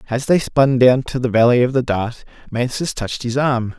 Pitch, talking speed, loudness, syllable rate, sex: 125 Hz, 220 wpm, -17 LUFS, 5.3 syllables/s, male